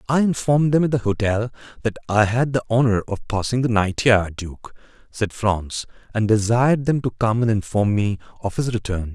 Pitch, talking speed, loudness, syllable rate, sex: 110 Hz, 195 wpm, -21 LUFS, 5.4 syllables/s, male